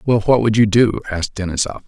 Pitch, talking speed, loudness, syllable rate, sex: 105 Hz, 225 wpm, -17 LUFS, 6.5 syllables/s, male